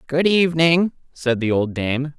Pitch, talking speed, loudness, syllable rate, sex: 145 Hz, 165 wpm, -19 LUFS, 4.4 syllables/s, male